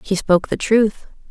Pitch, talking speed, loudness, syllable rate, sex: 205 Hz, 185 wpm, -17 LUFS, 5.0 syllables/s, female